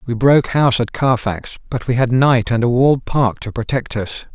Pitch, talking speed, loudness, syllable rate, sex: 120 Hz, 220 wpm, -16 LUFS, 5.4 syllables/s, male